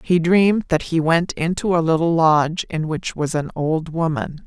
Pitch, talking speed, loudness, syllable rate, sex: 165 Hz, 200 wpm, -19 LUFS, 4.7 syllables/s, female